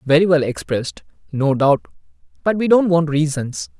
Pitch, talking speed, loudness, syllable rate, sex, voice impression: 155 Hz, 160 wpm, -18 LUFS, 5.0 syllables/s, male, masculine, very adult-like, middle-aged, thick, slightly tensed, slightly weak, slightly bright, hard, clear, fluent, slightly cool, very intellectual, sincere, calm, slightly mature, slightly friendly, unique, slightly wild, slightly kind, modest